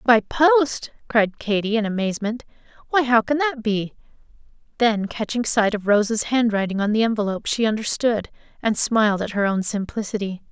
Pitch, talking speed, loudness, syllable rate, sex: 220 Hz, 160 wpm, -21 LUFS, 5.2 syllables/s, female